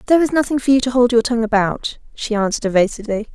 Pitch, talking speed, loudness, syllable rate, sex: 235 Hz, 235 wpm, -17 LUFS, 7.7 syllables/s, female